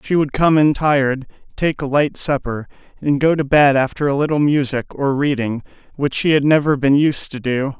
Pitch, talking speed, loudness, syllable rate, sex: 140 Hz, 210 wpm, -17 LUFS, 5.1 syllables/s, male